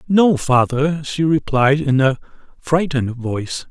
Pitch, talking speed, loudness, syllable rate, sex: 145 Hz, 130 wpm, -17 LUFS, 4.2 syllables/s, male